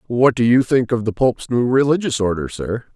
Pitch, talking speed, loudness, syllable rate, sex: 120 Hz, 225 wpm, -18 LUFS, 5.5 syllables/s, male